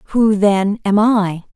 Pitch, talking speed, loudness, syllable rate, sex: 205 Hz, 155 wpm, -15 LUFS, 2.9 syllables/s, female